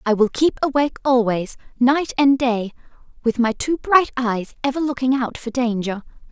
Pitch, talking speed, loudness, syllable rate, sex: 250 Hz, 170 wpm, -20 LUFS, 4.8 syllables/s, female